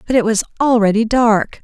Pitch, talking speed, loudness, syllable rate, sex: 225 Hz, 185 wpm, -15 LUFS, 5.3 syllables/s, female